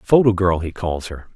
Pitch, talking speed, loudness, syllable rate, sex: 95 Hz, 220 wpm, -19 LUFS, 4.7 syllables/s, male